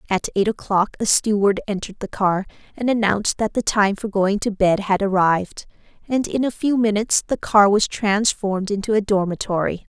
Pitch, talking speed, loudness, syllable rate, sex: 205 Hz, 185 wpm, -20 LUFS, 5.3 syllables/s, female